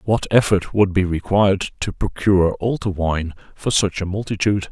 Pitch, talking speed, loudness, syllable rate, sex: 95 Hz, 165 wpm, -19 LUFS, 5.1 syllables/s, male